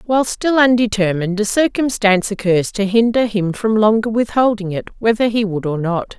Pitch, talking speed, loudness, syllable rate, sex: 215 Hz, 175 wpm, -16 LUFS, 5.4 syllables/s, female